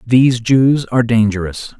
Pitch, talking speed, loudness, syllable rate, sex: 120 Hz, 135 wpm, -14 LUFS, 4.8 syllables/s, male